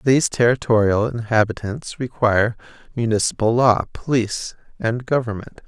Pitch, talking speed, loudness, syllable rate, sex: 115 Hz, 95 wpm, -20 LUFS, 5.1 syllables/s, male